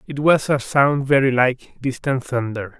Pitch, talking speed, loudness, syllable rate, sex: 130 Hz, 170 wpm, -19 LUFS, 4.2 syllables/s, male